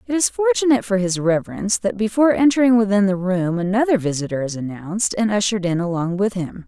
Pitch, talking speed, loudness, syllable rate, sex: 205 Hz, 200 wpm, -19 LUFS, 6.4 syllables/s, female